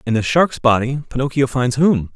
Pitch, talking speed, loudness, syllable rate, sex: 130 Hz, 195 wpm, -17 LUFS, 5.1 syllables/s, male